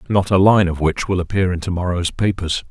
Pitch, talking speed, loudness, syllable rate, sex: 90 Hz, 245 wpm, -18 LUFS, 5.7 syllables/s, male